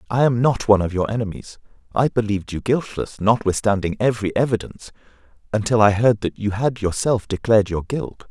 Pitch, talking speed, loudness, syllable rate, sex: 110 Hz, 175 wpm, -20 LUFS, 5.9 syllables/s, male